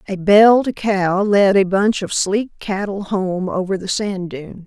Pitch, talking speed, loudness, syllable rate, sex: 195 Hz, 180 wpm, -17 LUFS, 4.1 syllables/s, female